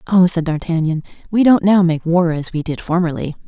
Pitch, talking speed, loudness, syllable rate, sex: 170 Hz, 205 wpm, -16 LUFS, 5.4 syllables/s, female